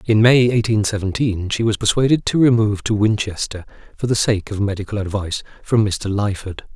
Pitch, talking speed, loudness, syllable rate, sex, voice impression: 105 Hz, 180 wpm, -18 LUFS, 5.6 syllables/s, male, masculine, slightly middle-aged, tensed, powerful, slightly hard, fluent, slightly raspy, cool, intellectual, calm, mature, reassuring, wild, lively, slightly kind, slightly modest